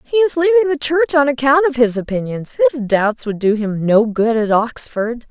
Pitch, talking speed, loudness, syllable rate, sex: 255 Hz, 205 wpm, -16 LUFS, 4.7 syllables/s, female